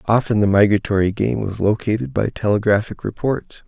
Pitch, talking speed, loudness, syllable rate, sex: 105 Hz, 145 wpm, -19 LUFS, 5.4 syllables/s, male